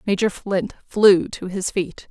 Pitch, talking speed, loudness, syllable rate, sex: 190 Hz, 170 wpm, -20 LUFS, 3.7 syllables/s, female